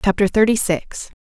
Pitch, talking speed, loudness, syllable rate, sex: 200 Hz, 145 wpm, -17 LUFS, 4.9 syllables/s, female